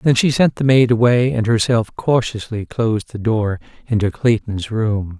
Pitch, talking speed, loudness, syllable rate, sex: 115 Hz, 175 wpm, -17 LUFS, 4.6 syllables/s, male